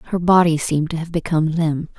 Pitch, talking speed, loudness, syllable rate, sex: 165 Hz, 210 wpm, -18 LUFS, 5.8 syllables/s, female